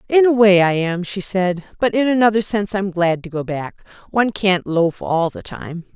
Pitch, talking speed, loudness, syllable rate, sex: 195 Hz, 220 wpm, -18 LUFS, 4.9 syllables/s, female